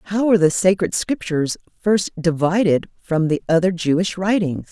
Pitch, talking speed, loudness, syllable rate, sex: 180 Hz, 155 wpm, -19 LUFS, 5.0 syllables/s, female